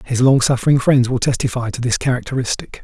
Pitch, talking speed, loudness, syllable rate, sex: 125 Hz, 190 wpm, -17 LUFS, 6.2 syllables/s, male